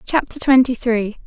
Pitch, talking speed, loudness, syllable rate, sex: 245 Hz, 140 wpm, -17 LUFS, 4.7 syllables/s, female